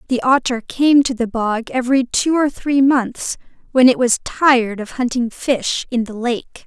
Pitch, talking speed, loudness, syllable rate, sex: 250 Hz, 190 wpm, -17 LUFS, 4.4 syllables/s, female